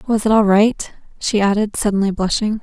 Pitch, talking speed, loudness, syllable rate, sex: 210 Hz, 185 wpm, -16 LUFS, 5.2 syllables/s, female